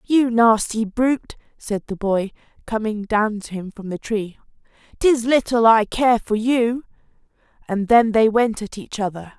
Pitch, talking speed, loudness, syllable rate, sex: 220 Hz, 165 wpm, -20 LUFS, 4.4 syllables/s, female